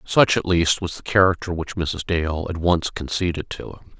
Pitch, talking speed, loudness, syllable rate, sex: 85 Hz, 210 wpm, -21 LUFS, 5.0 syllables/s, male